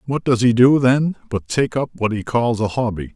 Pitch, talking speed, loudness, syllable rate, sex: 120 Hz, 245 wpm, -18 LUFS, 5.1 syllables/s, male